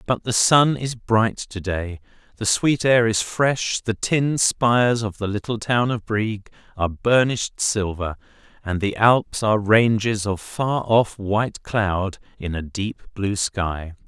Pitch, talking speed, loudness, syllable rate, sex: 105 Hz, 165 wpm, -21 LUFS, 3.9 syllables/s, male